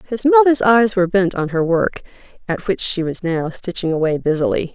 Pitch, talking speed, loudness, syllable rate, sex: 190 Hz, 200 wpm, -17 LUFS, 5.3 syllables/s, female